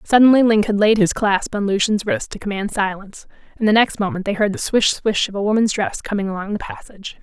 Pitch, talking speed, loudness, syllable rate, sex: 210 Hz, 240 wpm, -18 LUFS, 6.0 syllables/s, female